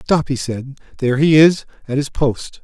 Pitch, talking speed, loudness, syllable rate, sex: 140 Hz, 205 wpm, -16 LUFS, 4.7 syllables/s, male